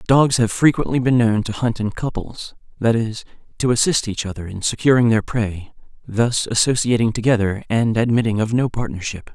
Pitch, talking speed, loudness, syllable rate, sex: 115 Hz, 175 wpm, -19 LUFS, 5.2 syllables/s, male